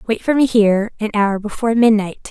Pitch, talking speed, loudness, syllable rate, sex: 215 Hz, 210 wpm, -16 LUFS, 5.9 syllables/s, female